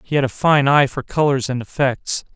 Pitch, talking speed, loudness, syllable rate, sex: 135 Hz, 230 wpm, -18 LUFS, 5.1 syllables/s, male